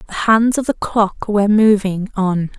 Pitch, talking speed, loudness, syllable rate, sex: 205 Hz, 185 wpm, -16 LUFS, 4.3 syllables/s, female